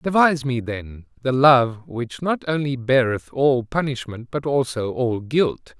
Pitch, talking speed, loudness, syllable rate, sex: 130 Hz, 155 wpm, -21 LUFS, 4.0 syllables/s, male